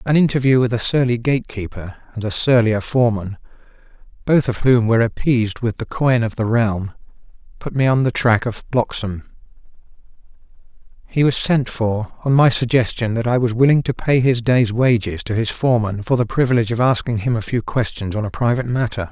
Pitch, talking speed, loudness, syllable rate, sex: 120 Hz, 190 wpm, -18 LUFS, 5.6 syllables/s, male